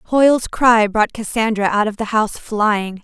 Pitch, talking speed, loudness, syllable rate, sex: 220 Hz, 180 wpm, -16 LUFS, 4.4 syllables/s, female